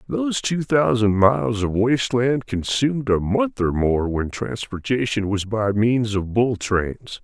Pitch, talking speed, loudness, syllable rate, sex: 115 Hz, 165 wpm, -21 LUFS, 4.1 syllables/s, male